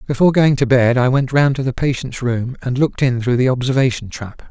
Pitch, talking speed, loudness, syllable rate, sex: 130 Hz, 240 wpm, -16 LUFS, 5.8 syllables/s, male